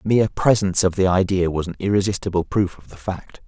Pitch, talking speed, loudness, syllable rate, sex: 95 Hz, 225 wpm, -20 LUFS, 6.2 syllables/s, male